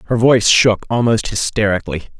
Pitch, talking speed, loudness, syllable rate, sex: 110 Hz, 135 wpm, -14 LUFS, 5.9 syllables/s, male